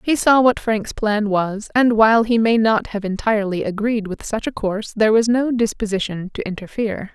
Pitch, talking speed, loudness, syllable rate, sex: 215 Hz, 200 wpm, -18 LUFS, 5.4 syllables/s, female